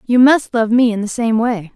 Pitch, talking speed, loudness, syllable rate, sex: 230 Hz, 275 wpm, -15 LUFS, 4.9 syllables/s, female